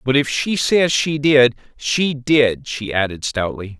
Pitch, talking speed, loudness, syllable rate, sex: 130 Hz, 175 wpm, -17 LUFS, 3.8 syllables/s, male